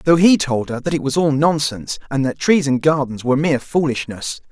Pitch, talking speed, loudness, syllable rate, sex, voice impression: 145 Hz, 225 wpm, -18 LUFS, 5.7 syllables/s, male, masculine, slightly young, adult-like, slightly thick, tensed, slightly powerful, very bright, slightly hard, very clear, very fluent, slightly cool, very intellectual, slightly refreshing, sincere, slightly calm, slightly friendly, slightly reassuring, wild, slightly sweet, slightly lively, slightly strict